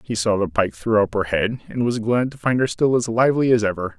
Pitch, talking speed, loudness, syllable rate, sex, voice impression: 115 Hz, 285 wpm, -20 LUFS, 5.8 syllables/s, male, very masculine, middle-aged, very thick, slightly relaxed, powerful, slightly bright, slightly hard, soft, clear, fluent, slightly raspy, cool, intellectual, slightly refreshing, sincere, calm, very mature, very friendly, very reassuring, very unique, elegant, wild, sweet, lively, kind, slightly intense, slightly modest